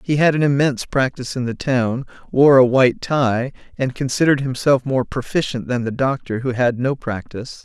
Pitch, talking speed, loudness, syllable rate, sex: 130 Hz, 190 wpm, -18 LUFS, 5.4 syllables/s, male